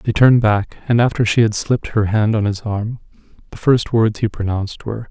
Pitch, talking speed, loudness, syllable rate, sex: 110 Hz, 225 wpm, -17 LUFS, 5.6 syllables/s, male